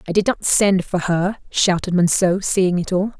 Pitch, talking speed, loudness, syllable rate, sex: 185 Hz, 205 wpm, -18 LUFS, 4.5 syllables/s, female